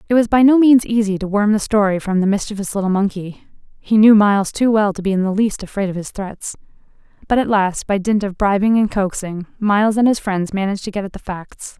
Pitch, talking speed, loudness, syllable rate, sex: 205 Hz, 245 wpm, -17 LUFS, 5.9 syllables/s, female